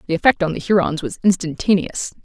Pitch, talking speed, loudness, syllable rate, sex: 175 Hz, 190 wpm, -18 LUFS, 5.9 syllables/s, female